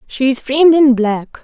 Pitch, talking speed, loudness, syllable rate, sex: 265 Hz, 165 wpm, -12 LUFS, 4.0 syllables/s, female